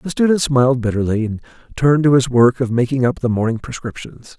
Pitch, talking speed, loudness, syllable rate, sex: 130 Hz, 205 wpm, -16 LUFS, 6.0 syllables/s, male